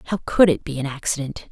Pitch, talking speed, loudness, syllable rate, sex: 155 Hz, 235 wpm, -21 LUFS, 6.3 syllables/s, female